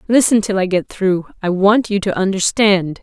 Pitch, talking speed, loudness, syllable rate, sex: 195 Hz, 180 wpm, -16 LUFS, 4.8 syllables/s, female